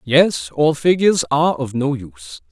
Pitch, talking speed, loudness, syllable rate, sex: 140 Hz, 165 wpm, -17 LUFS, 4.9 syllables/s, male